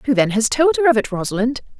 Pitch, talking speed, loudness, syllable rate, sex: 250 Hz, 265 wpm, -17 LUFS, 6.7 syllables/s, female